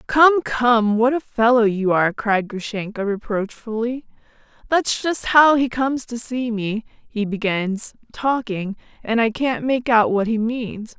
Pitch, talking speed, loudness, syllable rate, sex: 230 Hz, 155 wpm, -20 LUFS, 4.1 syllables/s, female